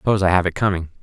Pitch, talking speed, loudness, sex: 90 Hz, 350 wpm, -19 LUFS, male